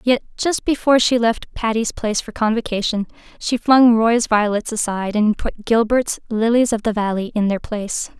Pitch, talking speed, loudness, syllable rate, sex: 225 Hz, 175 wpm, -18 LUFS, 5.1 syllables/s, female